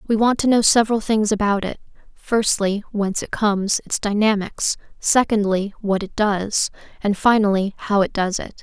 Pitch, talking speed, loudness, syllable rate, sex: 210 Hz, 165 wpm, -19 LUFS, 5.0 syllables/s, female